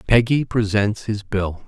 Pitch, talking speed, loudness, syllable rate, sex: 105 Hz, 145 wpm, -20 LUFS, 4.1 syllables/s, male